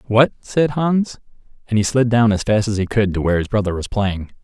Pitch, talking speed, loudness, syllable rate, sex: 110 Hz, 245 wpm, -18 LUFS, 5.6 syllables/s, male